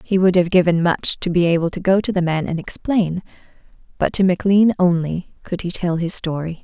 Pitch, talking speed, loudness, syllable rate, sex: 180 Hz, 215 wpm, -18 LUFS, 5.5 syllables/s, female